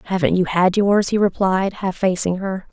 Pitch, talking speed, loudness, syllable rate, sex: 190 Hz, 200 wpm, -18 LUFS, 4.7 syllables/s, female